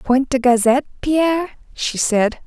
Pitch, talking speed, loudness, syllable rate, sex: 265 Hz, 145 wpm, -17 LUFS, 4.6 syllables/s, female